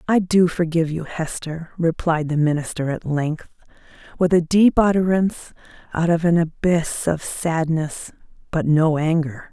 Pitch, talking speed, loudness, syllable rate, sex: 165 Hz, 145 wpm, -20 LUFS, 4.6 syllables/s, female